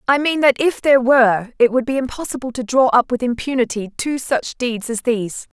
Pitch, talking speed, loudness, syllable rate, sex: 250 Hz, 215 wpm, -18 LUFS, 5.6 syllables/s, female